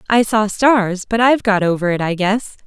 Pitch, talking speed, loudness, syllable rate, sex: 210 Hz, 225 wpm, -16 LUFS, 5.1 syllables/s, female